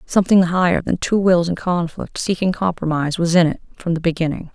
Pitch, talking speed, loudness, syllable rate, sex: 175 Hz, 200 wpm, -18 LUFS, 5.8 syllables/s, female